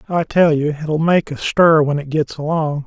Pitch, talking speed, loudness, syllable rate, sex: 155 Hz, 230 wpm, -16 LUFS, 4.6 syllables/s, male